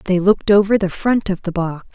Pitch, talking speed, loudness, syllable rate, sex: 190 Hz, 245 wpm, -17 LUFS, 5.8 syllables/s, female